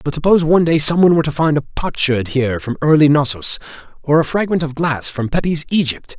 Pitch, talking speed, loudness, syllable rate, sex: 150 Hz, 215 wpm, -16 LUFS, 6.4 syllables/s, male